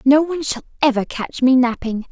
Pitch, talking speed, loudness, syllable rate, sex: 260 Hz, 200 wpm, -18 LUFS, 5.4 syllables/s, female